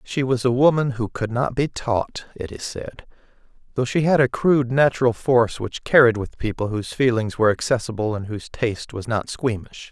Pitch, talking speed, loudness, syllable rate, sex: 120 Hz, 200 wpm, -21 LUFS, 5.4 syllables/s, male